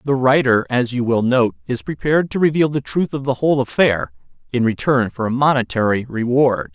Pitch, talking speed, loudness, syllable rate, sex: 130 Hz, 195 wpm, -18 LUFS, 5.5 syllables/s, male